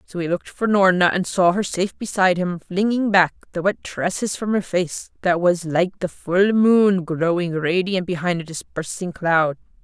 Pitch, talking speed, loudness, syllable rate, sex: 180 Hz, 190 wpm, -20 LUFS, 4.7 syllables/s, female